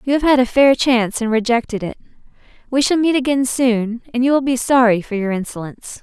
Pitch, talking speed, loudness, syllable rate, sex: 245 Hz, 220 wpm, -16 LUFS, 5.9 syllables/s, female